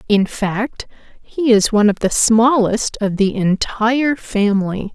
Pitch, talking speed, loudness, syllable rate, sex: 220 Hz, 145 wpm, -16 LUFS, 4.1 syllables/s, female